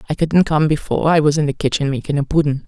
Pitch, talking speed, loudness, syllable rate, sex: 150 Hz, 245 wpm, -17 LUFS, 6.8 syllables/s, female